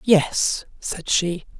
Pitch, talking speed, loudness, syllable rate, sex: 180 Hz, 115 wpm, -22 LUFS, 2.4 syllables/s, female